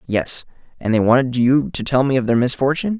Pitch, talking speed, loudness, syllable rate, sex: 130 Hz, 220 wpm, -18 LUFS, 6.1 syllables/s, male